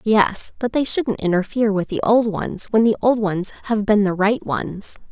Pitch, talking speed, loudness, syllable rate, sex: 210 Hz, 210 wpm, -19 LUFS, 4.6 syllables/s, female